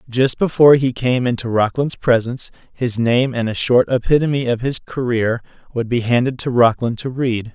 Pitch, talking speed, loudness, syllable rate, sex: 125 Hz, 185 wpm, -17 LUFS, 5.1 syllables/s, male